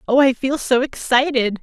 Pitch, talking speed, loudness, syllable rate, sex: 260 Hz, 185 wpm, -18 LUFS, 4.8 syllables/s, female